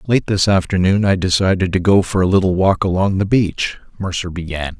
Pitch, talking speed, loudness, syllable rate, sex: 95 Hz, 200 wpm, -16 LUFS, 5.4 syllables/s, male